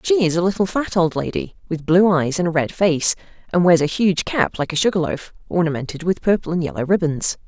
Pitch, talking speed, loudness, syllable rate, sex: 175 Hz, 235 wpm, -19 LUFS, 5.7 syllables/s, female